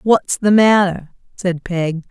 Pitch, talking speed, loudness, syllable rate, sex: 190 Hz, 140 wpm, -16 LUFS, 3.4 syllables/s, female